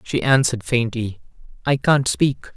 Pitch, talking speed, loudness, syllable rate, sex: 120 Hz, 140 wpm, -20 LUFS, 4.5 syllables/s, male